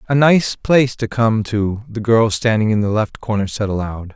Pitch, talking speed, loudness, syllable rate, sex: 110 Hz, 215 wpm, -17 LUFS, 4.9 syllables/s, male